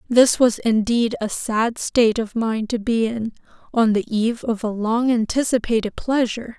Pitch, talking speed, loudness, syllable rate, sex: 230 Hz, 175 wpm, -20 LUFS, 4.8 syllables/s, female